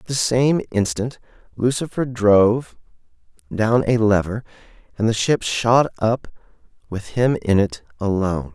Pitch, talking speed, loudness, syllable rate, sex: 110 Hz, 135 wpm, -19 LUFS, 4.3 syllables/s, male